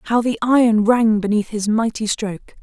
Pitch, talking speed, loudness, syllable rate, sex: 220 Hz, 185 wpm, -18 LUFS, 4.8 syllables/s, female